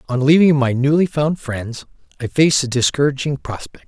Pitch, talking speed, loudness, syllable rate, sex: 140 Hz, 170 wpm, -17 LUFS, 5.4 syllables/s, male